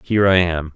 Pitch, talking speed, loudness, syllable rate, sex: 90 Hz, 235 wpm, -16 LUFS, 6.2 syllables/s, male